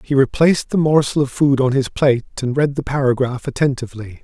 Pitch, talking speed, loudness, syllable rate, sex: 135 Hz, 200 wpm, -17 LUFS, 5.9 syllables/s, male